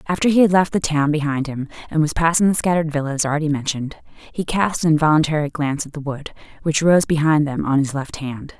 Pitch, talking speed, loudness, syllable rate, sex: 155 Hz, 225 wpm, -19 LUFS, 6.2 syllables/s, female